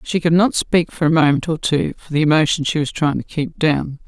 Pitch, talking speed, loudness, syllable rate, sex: 155 Hz, 265 wpm, -17 LUFS, 5.4 syllables/s, female